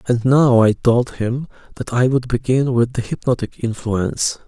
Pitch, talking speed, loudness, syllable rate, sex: 120 Hz, 175 wpm, -18 LUFS, 4.6 syllables/s, male